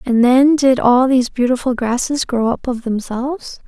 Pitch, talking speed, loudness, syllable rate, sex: 250 Hz, 180 wpm, -15 LUFS, 4.8 syllables/s, female